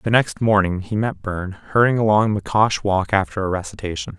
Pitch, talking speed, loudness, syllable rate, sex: 100 Hz, 185 wpm, -20 LUFS, 5.6 syllables/s, male